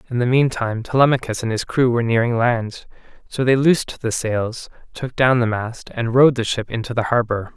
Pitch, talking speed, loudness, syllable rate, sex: 120 Hz, 215 wpm, -19 LUFS, 5.3 syllables/s, male